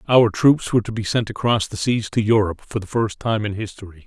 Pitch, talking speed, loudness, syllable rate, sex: 105 Hz, 250 wpm, -20 LUFS, 6.0 syllables/s, male